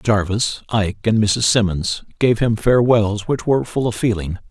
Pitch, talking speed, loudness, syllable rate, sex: 110 Hz, 175 wpm, -18 LUFS, 4.9 syllables/s, male